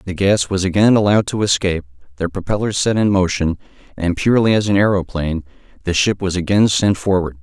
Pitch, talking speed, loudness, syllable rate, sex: 95 Hz, 185 wpm, -17 LUFS, 6.2 syllables/s, male